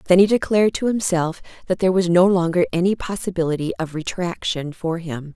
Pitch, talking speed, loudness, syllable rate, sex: 175 Hz, 180 wpm, -20 LUFS, 6.0 syllables/s, female